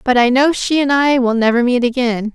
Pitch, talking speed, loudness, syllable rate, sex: 250 Hz, 255 wpm, -14 LUFS, 5.3 syllables/s, female